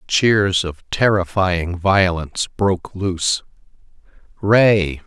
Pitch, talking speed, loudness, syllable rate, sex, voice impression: 95 Hz, 85 wpm, -18 LUFS, 3.3 syllables/s, male, very masculine, very adult-like, middle-aged, very thick, tensed, slightly weak, slightly dark, soft, slightly muffled, fluent, very cool, intellectual, slightly refreshing, slightly sincere, calm, very mature, friendly, reassuring, unique, very wild, sweet, slightly kind, slightly modest